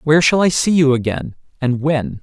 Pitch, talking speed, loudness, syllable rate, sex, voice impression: 145 Hz, 215 wpm, -16 LUFS, 5.3 syllables/s, male, masculine, slightly young, slightly adult-like, slightly cool, intellectual, slightly refreshing, unique